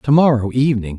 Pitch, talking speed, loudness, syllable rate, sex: 125 Hz, 180 wpm, -16 LUFS, 6.3 syllables/s, male